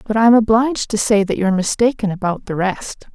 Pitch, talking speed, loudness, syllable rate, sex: 210 Hz, 210 wpm, -16 LUFS, 5.7 syllables/s, female